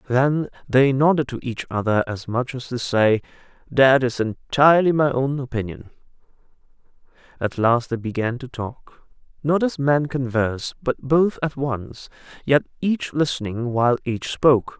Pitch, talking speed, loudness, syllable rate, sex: 130 Hz, 150 wpm, -21 LUFS, 4.5 syllables/s, male